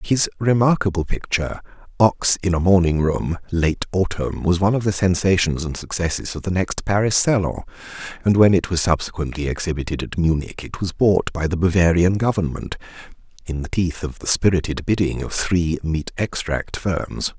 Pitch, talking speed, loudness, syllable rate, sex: 90 Hz, 170 wpm, -20 LUFS, 5.1 syllables/s, male